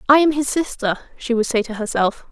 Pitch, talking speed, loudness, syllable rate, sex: 245 Hz, 235 wpm, -20 LUFS, 5.6 syllables/s, female